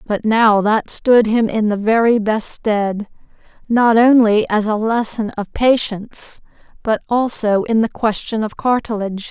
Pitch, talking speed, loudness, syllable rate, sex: 220 Hz, 155 wpm, -16 LUFS, 4.2 syllables/s, female